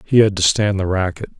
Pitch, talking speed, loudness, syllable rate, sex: 95 Hz, 260 wpm, -17 LUFS, 5.7 syllables/s, male